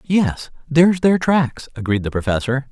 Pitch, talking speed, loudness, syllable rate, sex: 140 Hz, 155 wpm, -18 LUFS, 4.6 syllables/s, male